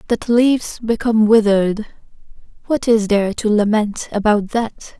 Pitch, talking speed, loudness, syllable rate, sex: 220 Hz, 120 wpm, -16 LUFS, 4.8 syllables/s, female